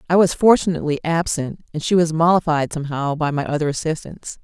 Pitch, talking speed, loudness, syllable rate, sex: 160 Hz, 175 wpm, -19 LUFS, 6.1 syllables/s, female